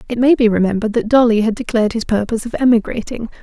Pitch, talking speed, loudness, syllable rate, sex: 230 Hz, 210 wpm, -15 LUFS, 7.4 syllables/s, female